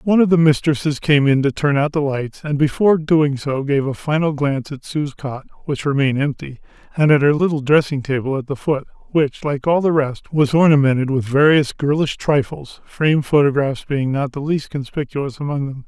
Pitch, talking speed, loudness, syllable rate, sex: 145 Hz, 205 wpm, -18 LUFS, 5.3 syllables/s, male